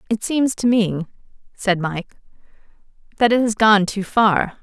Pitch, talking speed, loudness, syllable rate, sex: 210 Hz, 155 wpm, -18 LUFS, 4.4 syllables/s, female